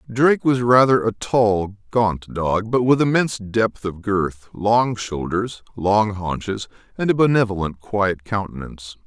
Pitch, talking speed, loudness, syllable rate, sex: 105 Hz, 145 wpm, -20 LUFS, 4.2 syllables/s, male